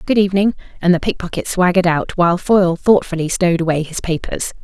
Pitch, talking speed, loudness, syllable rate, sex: 180 Hz, 195 wpm, -16 LUFS, 6.5 syllables/s, female